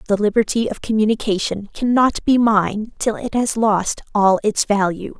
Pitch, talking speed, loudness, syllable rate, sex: 215 Hz, 160 wpm, -18 LUFS, 4.6 syllables/s, female